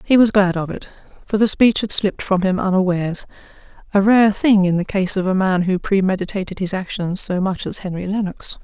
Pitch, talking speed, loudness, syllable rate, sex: 190 Hz, 210 wpm, -18 LUFS, 5.6 syllables/s, female